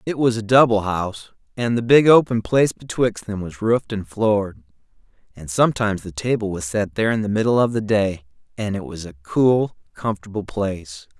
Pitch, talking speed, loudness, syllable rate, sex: 105 Hz, 195 wpm, -20 LUFS, 5.5 syllables/s, male